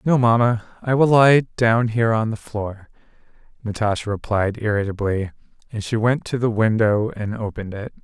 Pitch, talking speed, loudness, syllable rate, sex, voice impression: 110 Hz, 165 wpm, -20 LUFS, 5.1 syllables/s, male, masculine, adult-like, thick, tensed, slightly powerful, slightly bright, slightly soft, clear, slightly halting, cool, very intellectual, refreshing, sincere, calm, slightly mature, friendly, reassuring, unique, elegant, wild, slightly sweet, lively, kind, modest